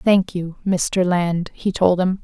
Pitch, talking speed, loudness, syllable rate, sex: 180 Hz, 190 wpm, -20 LUFS, 3.4 syllables/s, female